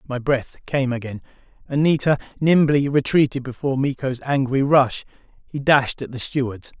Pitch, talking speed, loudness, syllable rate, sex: 135 Hz, 140 wpm, -20 LUFS, 5.0 syllables/s, male